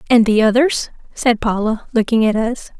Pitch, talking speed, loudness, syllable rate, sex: 230 Hz, 170 wpm, -16 LUFS, 4.9 syllables/s, female